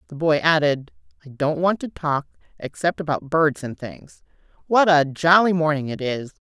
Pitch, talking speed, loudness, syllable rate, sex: 155 Hz, 175 wpm, -20 LUFS, 4.7 syllables/s, female